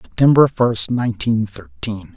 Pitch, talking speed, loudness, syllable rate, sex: 120 Hz, 110 wpm, -17 LUFS, 5.2 syllables/s, male